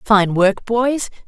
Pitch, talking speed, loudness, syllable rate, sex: 215 Hz, 140 wpm, -17 LUFS, 3.0 syllables/s, female